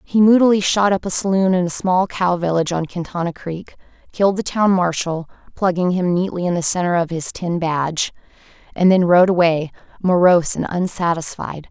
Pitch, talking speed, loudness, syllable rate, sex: 180 Hz, 180 wpm, -18 LUFS, 4.3 syllables/s, female